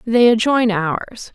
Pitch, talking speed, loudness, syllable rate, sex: 225 Hz, 135 wpm, -16 LUFS, 3.3 syllables/s, female